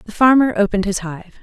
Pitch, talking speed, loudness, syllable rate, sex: 210 Hz, 210 wpm, -16 LUFS, 6.5 syllables/s, female